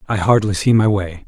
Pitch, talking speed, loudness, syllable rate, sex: 100 Hz, 235 wpm, -16 LUFS, 5.4 syllables/s, male